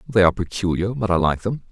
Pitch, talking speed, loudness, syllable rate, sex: 100 Hz, 245 wpm, -21 LUFS, 6.7 syllables/s, male